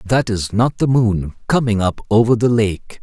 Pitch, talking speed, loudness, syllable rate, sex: 110 Hz, 200 wpm, -17 LUFS, 4.4 syllables/s, male